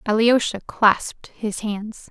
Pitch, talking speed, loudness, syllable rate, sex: 215 Hz, 115 wpm, -21 LUFS, 3.6 syllables/s, female